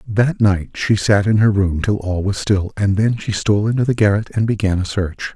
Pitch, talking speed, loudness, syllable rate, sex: 105 Hz, 245 wpm, -17 LUFS, 5.1 syllables/s, male